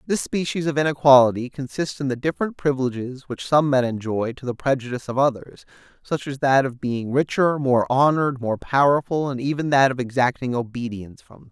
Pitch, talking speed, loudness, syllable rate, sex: 135 Hz, 190 wpm, -21 LUFS, 5.8 syllables/s, male